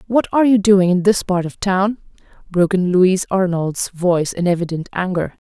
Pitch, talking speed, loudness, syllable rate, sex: 185 Hz, 185 wpm, -17 LUFS, 5.3 syllables/s, female